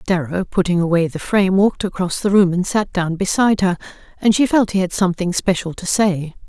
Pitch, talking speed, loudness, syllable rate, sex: 190 Hz, 215 wpm, -17 LUFS, 5.8 syllables/s, female